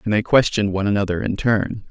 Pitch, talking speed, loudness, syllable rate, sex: 105 Hz, 220 wpm, -19 LUFS, 6.8 syllables/s, male